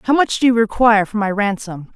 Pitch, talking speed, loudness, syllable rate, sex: 215 Hz, 245 wpm, -16 LUFS, 5.8 syllables/s, female